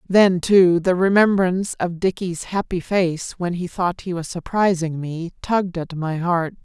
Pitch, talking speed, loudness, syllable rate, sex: 180 Hz, 170 wpm, -20 LUFS, 4.3 syllables/s, female